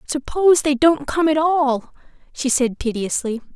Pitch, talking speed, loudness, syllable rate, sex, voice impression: 280 Hz, 150 wpm, -19 LUFS, 4.5 syllables/s, female, very feminine, young, very thin, tensed, powerful, very bright, hard, very clear, very fluent, slightly raspy, slightly cute, cool, slightly intellectual, very refreshing, sincere, friendly, reassuring, very unique, elegant, slightly sweet, very strict, very intense, very sharp